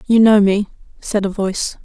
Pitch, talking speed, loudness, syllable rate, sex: 205 Hz, 195 wpm, -16 LUFS, 5.2 syllables/s, female